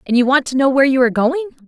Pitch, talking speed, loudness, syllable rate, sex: 265 Hz, 325 wpm, -15 LUFS, 8.5 syllables/s, female